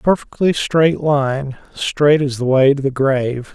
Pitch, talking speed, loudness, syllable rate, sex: 140 Hz, 170 wpm, -16 LUFS, 3.9 syllables/s, male